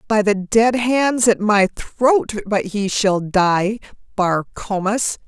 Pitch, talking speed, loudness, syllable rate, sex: 205 Hz, 150 wpm, -18 LUFS, 3.1 syllables/s, female